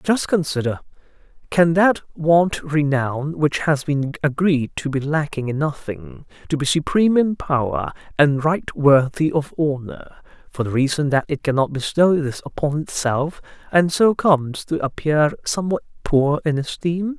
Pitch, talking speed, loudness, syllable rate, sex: 150 Hz, 155 wpm, -20 LUFS, 4.5 syllables/s, male